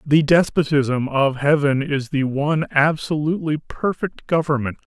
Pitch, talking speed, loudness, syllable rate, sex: 145 Hz, 120 wpm, -20 LUFS, 4.6 syllables/s, male